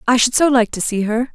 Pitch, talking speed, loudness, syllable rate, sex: 240 Hz, 310 wpm, -16 LUFS, 6.0 syllables/s, female